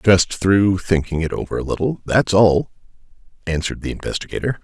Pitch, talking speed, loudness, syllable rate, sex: 95 Hz, 155 wpm, -19 LUFS, 5.6 syllables/s, male